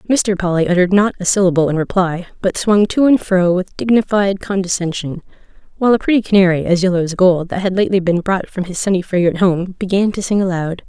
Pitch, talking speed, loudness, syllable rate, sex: 185 Hz, 210 wpm, -15 LUFS, 6.1 syllables/s, female